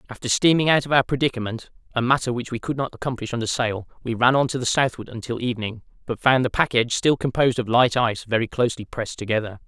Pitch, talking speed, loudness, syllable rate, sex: 120 Hz, 230 wpm, -22 LUFS, 6.7 syllables/s, male